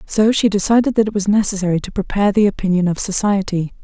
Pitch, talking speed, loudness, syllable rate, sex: 200 Hz, 205 wpm, -16 LUFS, 6.6 syllables/s, female